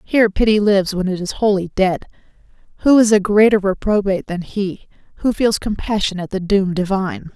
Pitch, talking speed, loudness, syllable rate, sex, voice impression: 200 Hz, 180 wpm, -17 LUFS, 5.6 syllables/s, female, very feminine, slightly young, adult-like, very thin, slightly tensed, weak, slightly bright, soft, very clear, fluent, slightly raspy, very cute, intellectual, very refreshing, sincere, very calm, very friendly, very reassuring, very unique, elegant, slightly wild, very sweet, lively, kind, slightly sharp, slightly modest, light